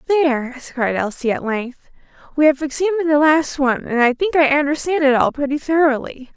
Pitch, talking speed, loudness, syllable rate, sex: 285 Hz, 190 wpm, -17 LUFS, 5.6 syllables/s, female